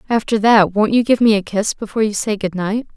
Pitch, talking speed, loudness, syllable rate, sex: 210 Hz, 265 wpm, -16 LUFS, 6.0 syllables/s, female